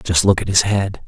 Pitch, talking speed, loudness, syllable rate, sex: 95 Hz, 280 wpm, -16 LUFS, 5.0 syllables/s, male